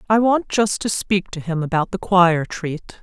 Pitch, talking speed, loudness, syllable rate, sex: 190 Hz, 220 wpm, -19 LUFS, 4.3 syllables/s, female